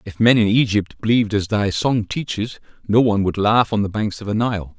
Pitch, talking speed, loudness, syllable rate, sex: 105 Hz, 240 wpm, -19 LUFS, 5.4 syllables/s, male